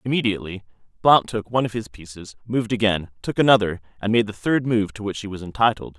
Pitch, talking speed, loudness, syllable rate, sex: 105 Hz, 210 wpm, -21 LUFS, 6.4 syllables/s, male